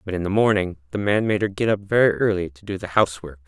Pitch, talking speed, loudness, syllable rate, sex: 95 Hz, 275 wpm, -21 LUFS, 6.6 syllables/s, male